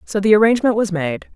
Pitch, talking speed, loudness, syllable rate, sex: 205 Hz, 220 wpm, -16 LUFS, 6.5 syllables/s, female